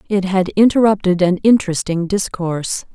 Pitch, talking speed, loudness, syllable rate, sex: 190 Hz, 120 wpm, -16 LUFS, 5.2 syllables/s, female